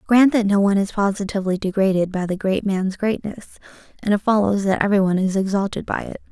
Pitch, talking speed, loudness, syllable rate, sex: 200 Hz, 200 wpm, -20 LUFS, 6.3 syllables/s, female